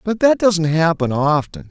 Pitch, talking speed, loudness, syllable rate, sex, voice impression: 170 Hz, 175 wpm, -16 LUFS, 4.4 syllables/s, male, masculine, adult-like, tensed, slightly powerful, slightly bright, clear, fluent, intellectual, friendly, unique, lively, slightly strict